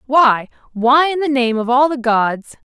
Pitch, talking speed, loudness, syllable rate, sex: 255 Hz, 175 wpm, -15 LUFS, 4.2 syllables/s, female